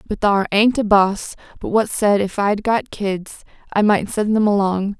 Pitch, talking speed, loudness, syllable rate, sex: 205 Hz, 205 wpm, -18 LUFS, 4.4 syllables/s, female